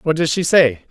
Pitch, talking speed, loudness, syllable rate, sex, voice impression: 150 Hz, 265 wpm, -15 LUFS, 4.8 syllables/s, male, very masculine, very middle-aged, very thick, tensed, slightly powerful, bright, slightly soft, slightly muffled, fluent, slightly raspy, slightly cool, intellectual, sincere, calm, mature, slightly friendly, reassuring, unique, elegant, slightly wild, slightly sweet, lively, kind, slightly modest